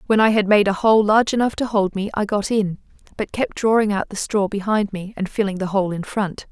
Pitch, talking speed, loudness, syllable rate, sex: 205 Hz, 260 wpm, -20 LUFS, 5.6 syllables/s, female